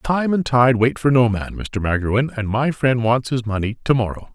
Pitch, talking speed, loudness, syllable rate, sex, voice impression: 120 Hz, 235 wpm, -19 LUFS, 4.8 syllables/s, male, very masculine, very adult-like, slightly thick, slightly muffled, fluent, cool, slightly intellectual, slightly wild